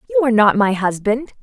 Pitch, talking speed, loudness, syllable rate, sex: 210 Hz, 210 wpm, -16 LUFS, 6.3 syllables/s, female